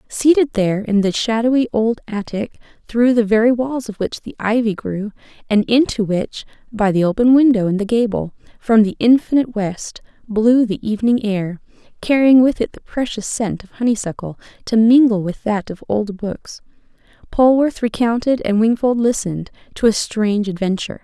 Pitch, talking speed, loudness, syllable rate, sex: 220 Hz, 165 wpm, -17 LUFS, 5.1 syllables/s, female